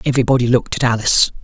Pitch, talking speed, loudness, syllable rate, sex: 120 Hz, 165 wpm, -15 LUFS, 8.9 syllables/s, male